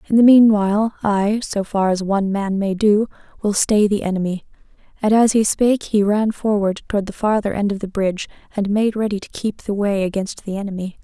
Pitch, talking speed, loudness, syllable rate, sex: 205 Hz, 210 wpm, -18 LUFS, 5.5 syllables/s, female